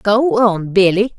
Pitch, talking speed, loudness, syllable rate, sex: 205 Hz, 150 wpm, -14 LUFS, 3.5 syllables/s, female